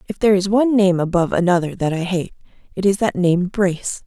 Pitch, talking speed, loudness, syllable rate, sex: 185 Hz, 220 wpm, -18 LUFS, 6.3 syllables/s, female